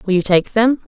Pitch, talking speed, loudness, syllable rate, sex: 210 Hz, 255 wpm, -15 LUFS, 5.6 syllables/s, female